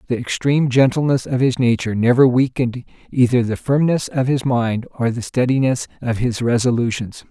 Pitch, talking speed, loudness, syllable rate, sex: 125 Hz, 165 wpm, -18 LUFS, 5.4 syllables/s, male